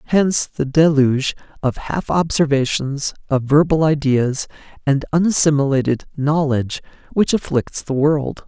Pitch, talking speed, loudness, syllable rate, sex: 145 Hz, 115 wpm, -18 LUFS, 4.6 syllables/s, male